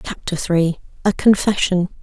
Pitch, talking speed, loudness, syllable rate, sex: 185 Hz, 120 wpm, -18 LUFS, 4.4 syllables/s, female